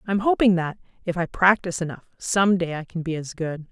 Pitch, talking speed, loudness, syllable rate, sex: 180 Hz, 225 wpm, -23 LUFS, 5.7 syllables/s, female